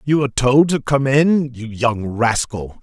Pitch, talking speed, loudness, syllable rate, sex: 130 Hz, 190 wpm, -17 LUFS, 4.1 syllables/s, male